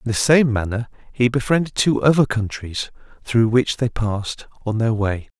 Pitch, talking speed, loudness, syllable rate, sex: 115 Hz, 180 wpm, -20 LUFS, 4.8 syllables/s, male